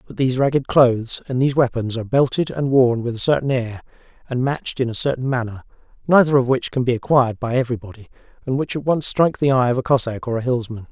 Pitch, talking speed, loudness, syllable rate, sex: 125 Hz, 230 wpm, -19 LUFS, 6.7 syllables/s, male